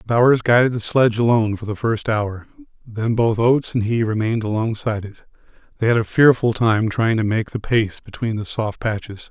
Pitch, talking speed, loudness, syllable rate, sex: 110 Hz, 200 wpm, -19 LUFS, 5.5 syllables/s, male